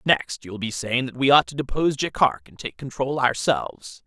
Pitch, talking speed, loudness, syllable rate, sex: 120 Hz, 205 wpm, -23 LUFS, 5.1 syllables/s, male